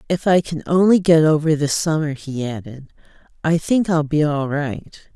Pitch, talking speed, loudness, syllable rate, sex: 155 Hz, 185 wpm, -18 LUFS, 4.6 syllables/s, female